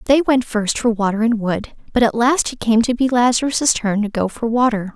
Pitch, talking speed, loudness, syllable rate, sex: 230 Hz, 240 wpm, -17 LUFS, 5.2 syllables/s, female